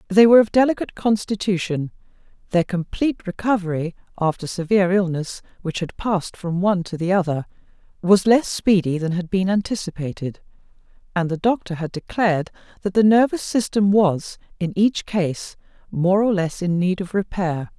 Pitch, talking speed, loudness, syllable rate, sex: 185 Hz, 155 wpm, -20 LUFS, 5.3 syllables/s, female